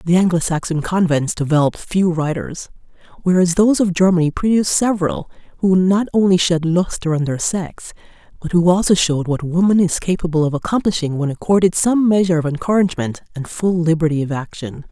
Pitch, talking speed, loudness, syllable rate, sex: 170 Hz, 170 wpm, -17 LUFS, 5.9 syllables/s, female